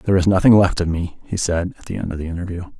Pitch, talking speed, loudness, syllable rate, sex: 90 Hz, 300 wpm, -19 LUFS, 7.1 syllables/s, male